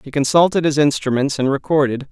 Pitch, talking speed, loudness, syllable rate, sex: 145 Hz, 170 wpm, -17 LUFS, 6.0 syllables/s, male